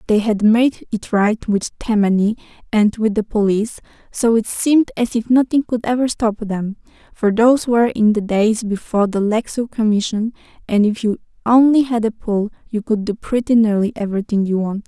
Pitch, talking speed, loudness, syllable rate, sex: 220 Hz, 185 wpm, -17 LUFS, 5.2 syllables/s, female